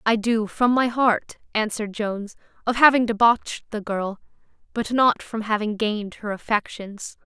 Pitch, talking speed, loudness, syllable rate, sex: 220 Hz, 155 wpm, -22 LUFS, 4.8 syllables/s, female